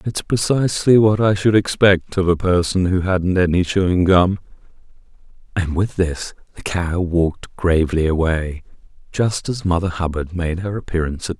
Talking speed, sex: 170 wpm, male